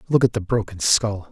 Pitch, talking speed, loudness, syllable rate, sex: 110 Hz, 230 wpm, -20 LUFS, 5.4 syllables/s, male